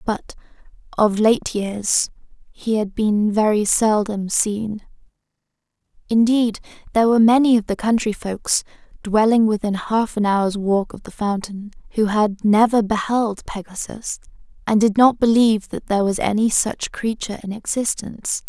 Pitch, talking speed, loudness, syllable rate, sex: 215 Hz, 145 wpm, -19 LUFS, 4.6 syllables/s, female